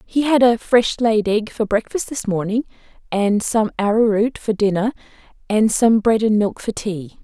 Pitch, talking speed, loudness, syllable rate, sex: 220 Hz, 185 wpm, -18 LUFS, 4.6 syllables/s, female